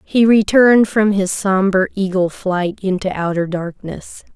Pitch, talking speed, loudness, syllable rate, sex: 195 Hz, 140 wpm, -16 LUFS, 4.2 syllables/s, female